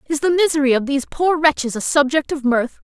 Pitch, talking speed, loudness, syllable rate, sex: 290 Hz, 225 wpm, -18 LUFS, 6.0 syllables/s, female